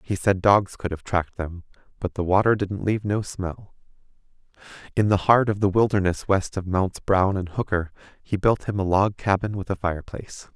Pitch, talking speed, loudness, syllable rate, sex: 95 Hz, 200 wpm, -23 LUFS, 5.3 syllables/s, male